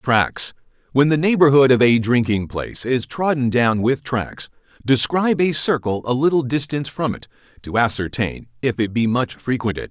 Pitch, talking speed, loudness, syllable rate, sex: 125 Hz, 165 wpm, -19 LUFS, 5.0 syllables/s, male